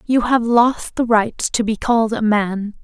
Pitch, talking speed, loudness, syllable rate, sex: 225 Hz, 210 wpm, -17 LUFS, 4.2 syllables/s, female